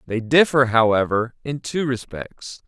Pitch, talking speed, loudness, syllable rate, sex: 125 Hz, 135 wpm, -19 LUFS, 4.2 syllables/s, male